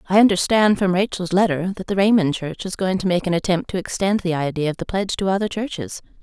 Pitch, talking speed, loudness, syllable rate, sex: 185 Hz, 240 wpm, -20 LUFS, 6.2 syllables/s, female